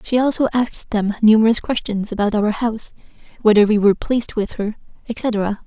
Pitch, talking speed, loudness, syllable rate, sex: 220 Hz, 170 wpm, -18 LUFS, 5.5 syllables/s, female